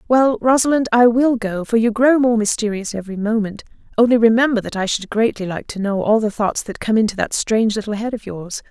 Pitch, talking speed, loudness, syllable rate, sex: 225 Hz, 225 wpm, -18 LUFS, 5.8 syllables/s, female